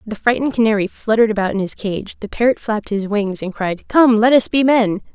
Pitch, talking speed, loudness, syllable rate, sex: 215 Hz, 235 wpm, -17 LUFS, 6.0 syllables/s, female